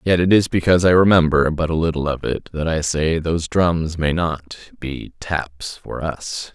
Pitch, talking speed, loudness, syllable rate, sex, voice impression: 80 Hz, 185 wpm, -19 LUFS, 4.5 syllables/s, male, masculine, adult-like, thick, tensed, powerful, hard, slightly muffled, cool, calm, mature, reassuring, wild, slightly kind